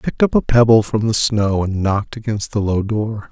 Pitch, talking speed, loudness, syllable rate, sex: 110 Hz, 255 wpm, -17 LUFS, 5.7 syllables/s, male